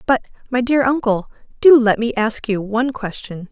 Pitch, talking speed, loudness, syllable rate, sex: 235 Hz, 190 wpm, -17 LUFS, 5.1 syllables/s, female